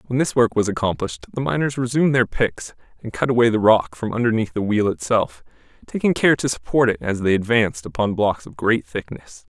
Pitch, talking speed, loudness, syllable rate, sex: 110 Hz, 205 wpm, -20 LUFS, 5.7 syllables/s, male